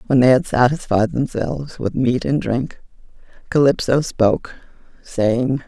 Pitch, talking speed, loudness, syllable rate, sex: 125 Hz, 125 wpm, -18 LUFS, 4.4 syllables/s, female